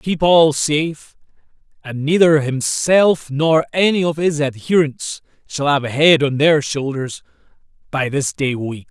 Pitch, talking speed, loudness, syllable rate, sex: 145 Hz, 150 wpm, -16 LUFS, 4.0 syllables/s, male